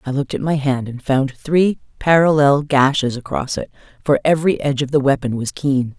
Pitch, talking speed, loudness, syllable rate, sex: 140 Hz, 200 wpm, -17 LUFS, 5.4 syllables/s, female